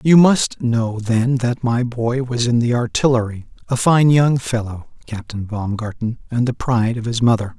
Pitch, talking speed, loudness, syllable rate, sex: 120 Hz, 175 wpm, -18 LUFS, 4.6 syllables/s, male